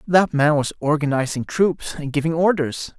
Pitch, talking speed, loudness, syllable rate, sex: 155 Hz, 160 wpm, -20 LUFS, 4.6 syllables/s, male